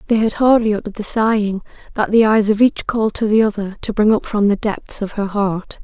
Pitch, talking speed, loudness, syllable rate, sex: 210 Hz, 245 wpm, -17 LUFS, 5.7 syllables/s, female